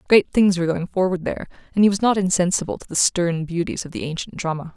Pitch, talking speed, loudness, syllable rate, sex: 180 Hz, 240 wpm, -21 LUFS, 6.5 syllables/s, female